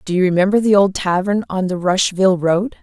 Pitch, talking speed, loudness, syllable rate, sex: 190 Hz, 210 wpm, -16 LUFS, 5.7 syllables/s, female